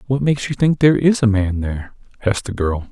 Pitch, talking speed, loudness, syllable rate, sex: 115 Hz, 245 wpm, -18 LUFS, 6.4 syllables/s, male